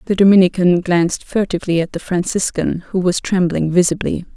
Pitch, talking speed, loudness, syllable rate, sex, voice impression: 180 Hz, 150 wpm, -16 LUFS, 5.6 syllables/s, female, feminine, adult-like, tensed, powerful, clear, intellectual, calm, reassuring, elegant, slightly sharp